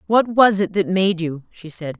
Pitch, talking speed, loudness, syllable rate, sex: 185 Hz, 240 wpm, -18 LUFS, 4.6 syllables/s, female